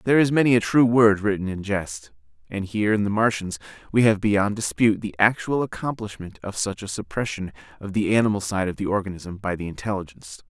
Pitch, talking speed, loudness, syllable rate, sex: 100 Hz, 200 wpm, -23 LUFS, 6.0 syllables/s, male